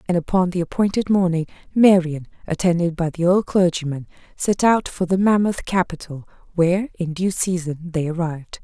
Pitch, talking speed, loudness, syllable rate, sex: 175 Hz, 160 wpm, -20 LUFS, 5.3 syllables/s, female